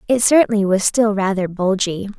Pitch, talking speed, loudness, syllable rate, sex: 205 Hz, 165 wpm, -17 LUFS, 5.2 syllables/s, female